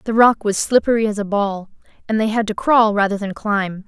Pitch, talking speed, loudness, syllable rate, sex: 210 Hz, 230 wpm, -18 LUFS, 5.4 syllables/s, female